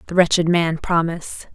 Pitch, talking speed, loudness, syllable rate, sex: 170 Hz, 155 wpm, -18 LUFS, 5.3 syllables/s, female